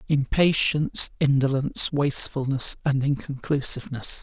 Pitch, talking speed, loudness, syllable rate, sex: 140 Hz, 70 wpm, -22 LUFS, 4.9 syllables/s, male